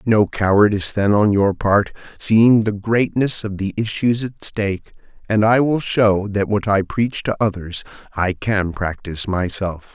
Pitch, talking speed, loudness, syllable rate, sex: 105 Hz, 170 wpm, -18 LUFS, 4.3 syllables/s, male